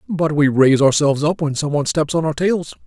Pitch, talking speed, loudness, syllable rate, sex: 150 Hz, 230 wpm, -17 LUFS, 6.1 syllables/s, male